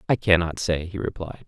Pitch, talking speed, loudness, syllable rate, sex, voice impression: 90 Hz, 205 wpm, -23 LUFS, 5.4 syllables/s, male, masculine, adult-like, thick, tensed, powerful, slightly dark, muffled, slightly raspy, intellectual, sincere, mature, wild, slightly kind, slightly modest